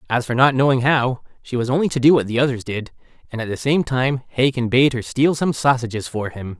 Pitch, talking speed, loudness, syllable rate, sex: 130 Hz, 245 wpm, -19 LUFS, 5.7 syllables/s, male